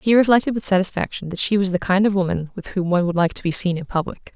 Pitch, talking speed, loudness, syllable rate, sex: 190 Hz, 290 wpm, -20 LUFS, 6.9 syllables/s, female